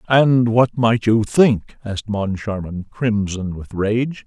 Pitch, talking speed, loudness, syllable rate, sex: 110 Hz, 140 wpm, -18 LUFS, 3.5 syllables/s, male